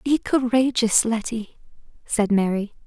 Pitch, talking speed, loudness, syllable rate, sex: 230 Hz, 105 wpm, -21 LUFS, 4.1 syllables/s, female